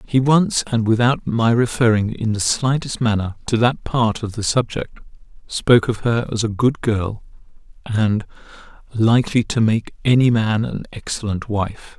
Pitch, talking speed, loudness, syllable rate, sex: 115 Hz, 160 wpm, -19 LUFS, 4.5 syllables/s, male